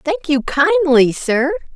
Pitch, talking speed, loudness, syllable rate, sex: 255 Hz, 135 wpm, -15 LUFS, 3.5 syllables/s, female